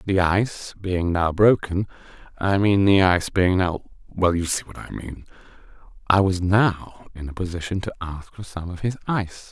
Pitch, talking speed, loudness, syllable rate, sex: 90 Hz, 170 wpm, -22 LUFS, 4.8 syllables/s, male